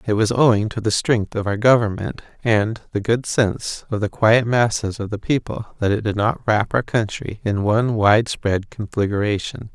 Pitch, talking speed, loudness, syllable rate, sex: 110 Hz, 190 wpm, -20 LUFS, 4.8 syllables/s, male